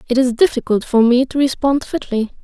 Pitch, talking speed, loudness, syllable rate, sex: 250 Hz, 195 wpm, -16 LUFS, 5.5 syllables/s, female